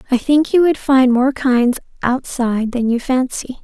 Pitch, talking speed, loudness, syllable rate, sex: 260 Hz, 180 wpm, -16 LUFS, 4.4 syllables/s, female